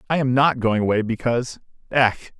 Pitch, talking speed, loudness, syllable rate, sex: 120 Hz, 175 wpm, -20 LUFS, 5.4 syllables/s, male